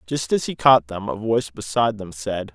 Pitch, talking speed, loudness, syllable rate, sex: 105 Hz, 235 wpm, -21 LUFS, 5.4 syllables/s, male